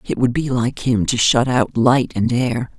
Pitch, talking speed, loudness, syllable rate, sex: 120 Hz, 235 wpm, -17 LUFS, 4.2 syllables/s, female